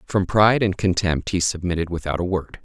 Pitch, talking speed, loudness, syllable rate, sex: 90 Hz, 205 wpm, -21 LUFS, 5.7 syllables/s, male